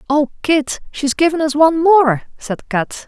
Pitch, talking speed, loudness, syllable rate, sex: 290 Hz, 175 wpm, -15 LUFS, 4.4 syllables/s, female